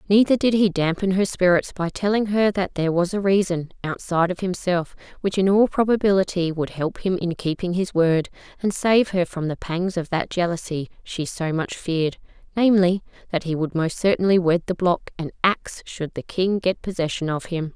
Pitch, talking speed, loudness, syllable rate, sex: 180 Hz, 200 wpm, -22 LUFS, 5.2 syllables/s, female